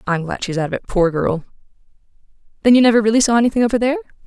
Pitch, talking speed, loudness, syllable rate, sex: 215 Hz, 240 wpm, -17 LUFS, 8.4 syllables/s, female